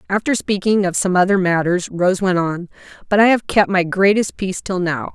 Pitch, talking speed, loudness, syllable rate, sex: 185 Hz, 210 wpm, -17 LUFS, 5.3 syllables/s, female